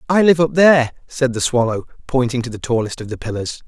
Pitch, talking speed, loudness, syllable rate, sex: 130 Hz, 230 wpm, -17 LUFS, 6.0 syllables/s, male